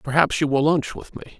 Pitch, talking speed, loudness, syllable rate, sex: 150 Hz, 260 wpm, -20 LUFS, 6.0 syllables/s, male